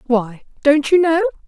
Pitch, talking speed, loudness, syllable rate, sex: 290 Hz, 160 wpm, -16 LUFS, 4.3 syllables/s, female